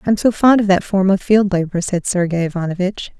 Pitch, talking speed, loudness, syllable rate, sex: 190 Hz, 225 wpm, -16 LUFS, 5.6 syllables/s, female